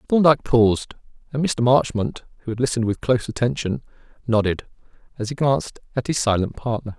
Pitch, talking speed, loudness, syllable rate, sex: 120 Hz, 165 wpm, -21 LUFS, 6.2 syllables/s, male